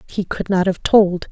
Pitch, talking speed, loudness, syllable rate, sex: 190 Hz, 230 wpm, -17 LUFS, 4.4 syllables/s, female